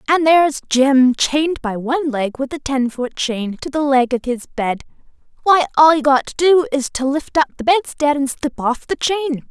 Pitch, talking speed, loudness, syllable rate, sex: 280 Hz, 220 wpm, -17 LUFS, 4.7 syllables/s, female